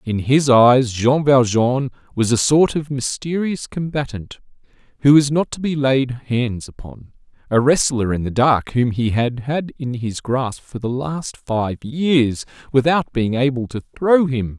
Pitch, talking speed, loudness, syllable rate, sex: 130 Hz, 175 wpm, -18 LUFS, 4.0 syllables/s, male